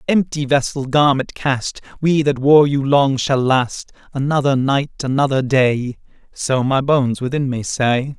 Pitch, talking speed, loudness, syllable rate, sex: 135 Hz, 155 wpm, -17 LUFS, 4.2 syllables/s, male